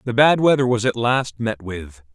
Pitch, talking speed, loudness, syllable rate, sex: 115 Hz, 225 wpm, -18 LUFS, 4.7 syllables/s, male